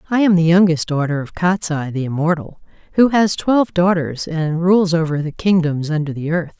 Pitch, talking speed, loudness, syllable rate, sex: 170 Hz, 190 wpm, -17 LUFS, 5.2 syllables/s, female